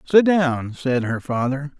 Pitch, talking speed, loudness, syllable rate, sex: 140 Hz, 165 wpm, -20 LUFS, 4.3 syllables/s, male